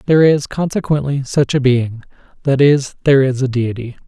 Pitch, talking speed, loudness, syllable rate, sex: 135 Hz, 175 wpm, -15 LUFS, 5.4 syllables/s, male